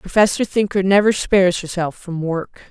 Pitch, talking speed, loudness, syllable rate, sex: 185 Hz, 155 wpm, -18 LUFS, 5.0 syllables/s, female